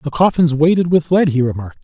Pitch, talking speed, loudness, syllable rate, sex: 155 Hz, 230 wpm, -15 LUFS, 6.3 syllables/s, male